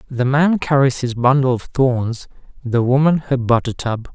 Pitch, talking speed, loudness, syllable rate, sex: 130 Hz, 175 wpm, -17 LUFS, 4.5 syllables/s, male